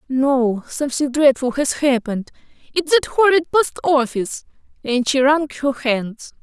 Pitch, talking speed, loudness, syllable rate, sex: 270 Hz, 130 wpm, -18 LUFS, 4.6 syllables/s, female